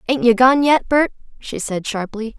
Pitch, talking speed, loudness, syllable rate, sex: 240 Hz, 200 wpm, -17 LUFS, 4.6 syllables/s, female